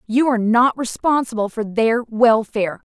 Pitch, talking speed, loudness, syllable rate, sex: 230 Hz, 145 wpm, -18 LUFS, 4.8 syllables/s, female